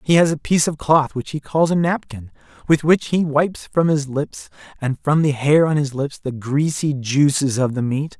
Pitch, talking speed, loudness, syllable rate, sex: 145 Hz, 225 wpm, -19 LUFS, 4.8 syllables/s, male